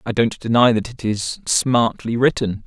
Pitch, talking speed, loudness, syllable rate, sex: 115 Hz, 180 wpm, -19 LUFS, 4.3 syllables/s, male